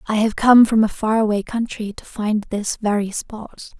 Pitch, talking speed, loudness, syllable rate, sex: 215 Hz, 205 wpm, -19 LUFS, 4.6 syllables/s, female